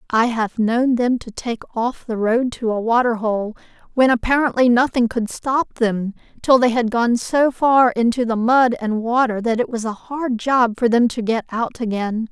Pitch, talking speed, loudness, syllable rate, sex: 235 Hz, 205 wpm, -18 LUFS, 4.4 syllables/s, female